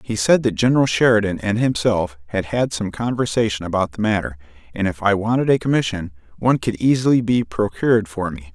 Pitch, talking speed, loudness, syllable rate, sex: 105 Hz, 190 wpm, -19 LUFS, 5.8 syllables/s, male